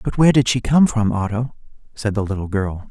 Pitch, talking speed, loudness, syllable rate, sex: 110 Hz, 225 wpm, -18 LUFS, 5.8 syllables/s, male